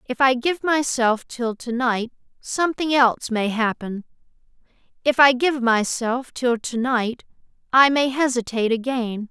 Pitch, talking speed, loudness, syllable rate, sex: 250 Hz, 140 wpm, -21 LUFS, 4.3 syllables/s, female